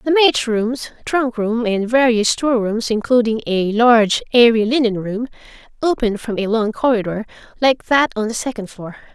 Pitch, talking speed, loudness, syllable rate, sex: 230 Hz, 170 wpm, -17 LUFS, 5.0 syllables/s, female